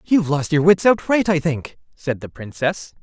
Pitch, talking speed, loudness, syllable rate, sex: 165 Hz, 200 wpm, -19 LUFS, 4.6 syllables/s, male